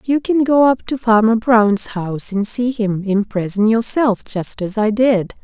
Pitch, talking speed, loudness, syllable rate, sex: 220 Hz, 200 wpm, -16 LUFS, 4.2 syllables/s, female